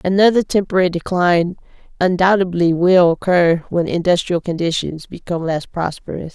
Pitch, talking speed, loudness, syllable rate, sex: 175 Hz, 115 wpm, -17 LUFS, 5.3 syllables/s, female